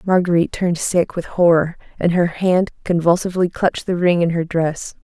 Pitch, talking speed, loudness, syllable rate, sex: 175 Hz, 175 wpm, -18 LUFS, 5.5 syllables/s, female